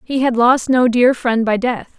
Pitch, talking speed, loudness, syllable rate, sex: 245 Hz, 240 wpm, -15 LUFS, 4.2 syllables/s, female